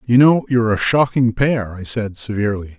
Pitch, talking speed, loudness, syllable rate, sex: 115 Hz, 195 wpm, -17 LUFS, 5.5 syllables/s, male